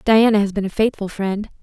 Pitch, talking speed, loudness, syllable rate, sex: 205 Hz, 220 wpm, -19 LUFS, 5.6 syllables/s, female